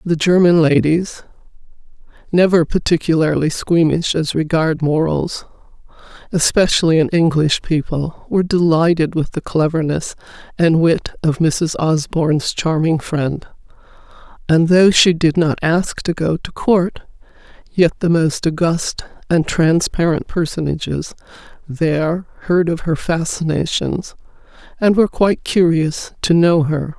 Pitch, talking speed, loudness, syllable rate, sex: 165 Hz, 120 wpm, -16 LUFS, 4.2 syllables/s, female